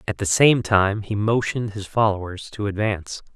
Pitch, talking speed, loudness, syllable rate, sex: 105 Hz, 180 wpm, -21 LUFS, 5.1 syllables/s, male